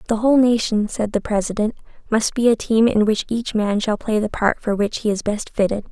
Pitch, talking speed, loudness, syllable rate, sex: 215 Hz, 245 wpm, -19 LUFS, 5.5 syllables/s, female